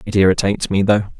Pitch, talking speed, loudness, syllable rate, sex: 100 Hz, 200 wpm, -16 LUFS, 7.4 syllables/s, male